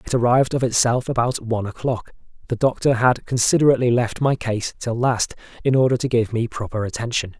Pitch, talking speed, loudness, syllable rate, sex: 120 Hz, 185 wpm, -20 LUFS, 6.0 syllables/s, male